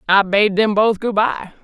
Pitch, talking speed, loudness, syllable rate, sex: 205 Hz, 220 wpm, -16 LUFS, 4.3 syllables/s, female